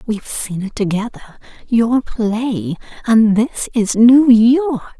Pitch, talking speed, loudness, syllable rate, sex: 225 Hz, 110 wpm, -15 LUFS, 3.7 syllables/s, female